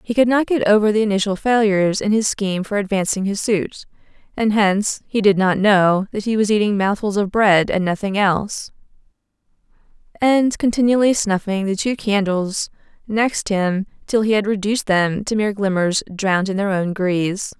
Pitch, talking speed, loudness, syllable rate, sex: 205 Hz, 175 wpm, -18 LUFS, 5.2 syllables/s, female